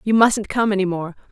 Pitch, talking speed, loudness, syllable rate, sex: 200 Hz, 230 wpm, -19 LUFS, 5.5 syllables/s, female